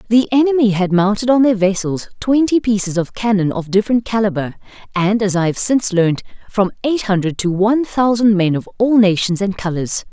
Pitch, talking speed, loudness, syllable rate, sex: 205 Hz, 190 wpm, -16 LUFS, 5.5 syllables/s, female